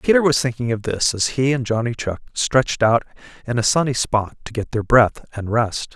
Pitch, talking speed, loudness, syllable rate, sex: 120 Hz, 220 wpm, -19 LUFS, 5.1 syllables/s, male